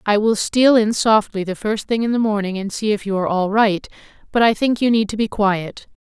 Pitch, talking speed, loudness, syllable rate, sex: 210 Hz, 260 wpm, -18 LUFS, 5.4 syllables/s, female